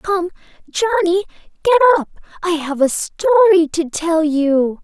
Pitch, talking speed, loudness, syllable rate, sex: 350 Hz, 135 wpm, -16 LUFS, 4.4 syllables/s, female